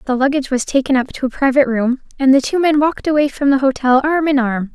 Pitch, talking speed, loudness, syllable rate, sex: 270 Hz, 265 wpm, -15 LUFS, 6.6 syllables/s, female